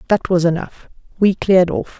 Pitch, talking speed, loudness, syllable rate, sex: 185 Hz, 180 wpm, -16 LUFS, 5.4 syllables/s, female